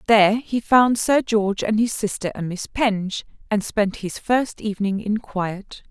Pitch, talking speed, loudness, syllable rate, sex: 210 Hz, 185 wpm, -21 LUFS, 4.4 syllables/s, female